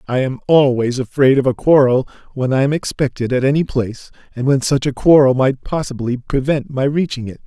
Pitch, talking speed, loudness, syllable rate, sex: 130 Hz, 200 wpm, -16 LUFS, 5.5 syllables/s, male